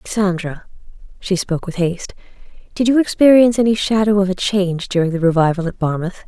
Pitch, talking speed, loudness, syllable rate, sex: 190 Hz, 170 wpm, -16 LUFS, 6.3 syllables/s, female